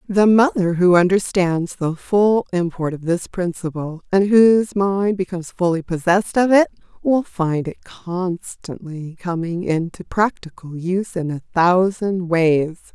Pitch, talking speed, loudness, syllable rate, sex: 180 Hz, 140 wpm, -19 LUFS, 4.2 syllables/s, female